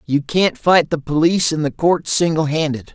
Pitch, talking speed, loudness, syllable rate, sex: 155 Hz, 205 wpm, -17 LUFS, 4.9 syllables/s, male